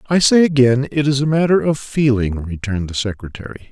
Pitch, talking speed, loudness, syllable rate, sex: 130 Hz, 195 wpm, -16 LUFS, 5.8 syllables/s, male